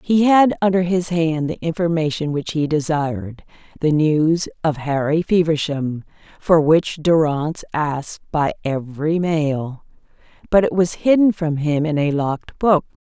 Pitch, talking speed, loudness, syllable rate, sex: 160 Hz, 145 wpm, -19 LUFS, 4.4 syllables/s, female